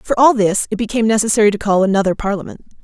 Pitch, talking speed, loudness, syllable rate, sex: 205 Hz, 210 wpm, -15 LUFS, 7.1 syllables/s, female